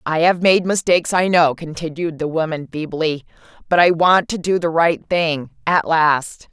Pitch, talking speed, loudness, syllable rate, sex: 165 Hz, 185 wpm, -17 LUFS, 4.6 syllables/s, female